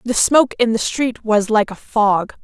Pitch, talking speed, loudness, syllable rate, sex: 225 Hz, 220 wpm, -16 LUFS, 4.5 syllables/s, female